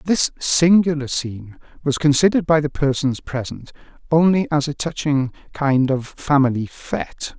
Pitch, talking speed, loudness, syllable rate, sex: 145 Hz, 140 wpm, -19 LUFS, 5.0 syllables/s, male